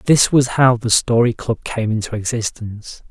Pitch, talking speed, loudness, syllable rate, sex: 115 Hz, 175 wpm, -17 LUFS, 4.6 syllables/s, male